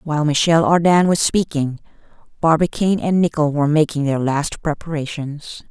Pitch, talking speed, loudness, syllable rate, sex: 155 Hz, 135 wpm, -18 LUFS, 5.3 syllables/s, female